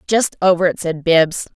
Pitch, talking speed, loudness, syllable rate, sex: 175 Hz, 190 wpm, -16 LUFS, 4.5 syllables/s, female